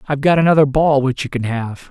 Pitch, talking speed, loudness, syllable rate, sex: 140 Hz, 250 wpm, -16 LUFS, 6.1 syllables/s, male